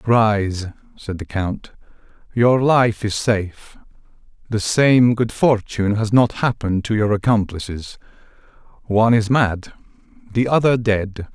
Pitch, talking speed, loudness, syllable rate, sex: 110 Hz, 120 wpm, -18 LUFS, 4.2 syllables/s, male